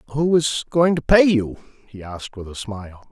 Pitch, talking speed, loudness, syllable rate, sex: 130 Hz, 210 wpm, -18 LUFS, 5.5 syllables/s, male